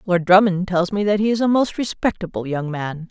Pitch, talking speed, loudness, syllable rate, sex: 190 Hz, 230 wpm, -19 LUFS, 5.4 syllables/s, female